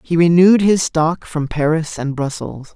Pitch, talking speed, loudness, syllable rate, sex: 160 Hz, 175 wpm, -16 LUFS, 4.5 syllables/s, male